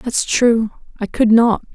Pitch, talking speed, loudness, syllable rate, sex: 230 Hz, 170 wpm, -15 LUFS, 3.7 syllables/s, female